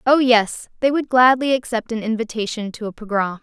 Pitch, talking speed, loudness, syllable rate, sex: 235 Hz, 195 wpm, -19 LUFS, 5.4 syllables/s, female